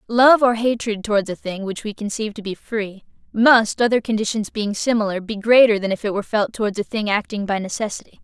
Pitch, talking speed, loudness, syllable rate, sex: 215 Hz, 220 wpm, -19 LUFS, 5.9 syllables/s, female